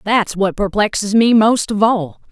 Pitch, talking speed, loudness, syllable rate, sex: 205 Hz, 180 wpm, -15 LUFS, 4.3 syllables/s, female